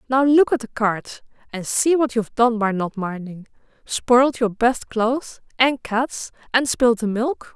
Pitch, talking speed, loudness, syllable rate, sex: 235 Hz, 185 wpm, -20 LUFS, 4.4 syllables/s, female